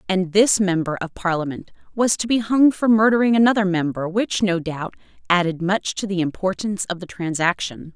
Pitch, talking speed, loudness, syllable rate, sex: 190 Hz, 180 wpm, -20 LUFS, 5.3 syllables/s, female